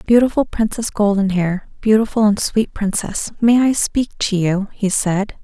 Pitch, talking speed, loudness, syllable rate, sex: 210 Hz, 155 wpm, -17 LUFS, 4.5 syllables/s, female